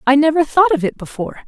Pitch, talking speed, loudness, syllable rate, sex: 285 Hz, 245 wpm, -15 LUFS, 7.0 syllables/s, female